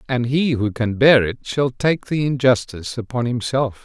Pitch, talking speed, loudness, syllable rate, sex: 125 Hz, 190 wpm, -19 LUFS, 4.6 syllables/s, male